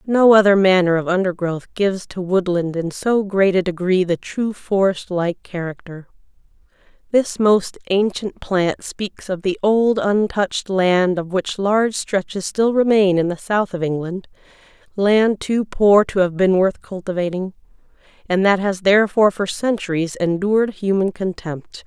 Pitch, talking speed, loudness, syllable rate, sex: 195 Hz, 150 wpm, -18 LUFS, 4.5 syllables/s, female